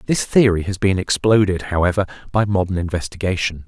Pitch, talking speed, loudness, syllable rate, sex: 95 Hz, 145 wpm, -18 LUFS, 5.9 syllables/s, male